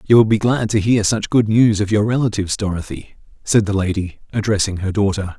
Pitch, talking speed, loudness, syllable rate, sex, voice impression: 105 Hz, 210 wpm, -17 LUFS, 5.8 syllables/s, male, very masculine, very adult-like, very middle-aged, very thick, tensed, very powerful, slightly bright, slightly soft, clear, fluent, cool, very intellectual, refreshing, very sincere, very calm, mature, very friendly, very reassuring, unique, very elegant, wild, very sweet, slightly lively, very kind, slightly modest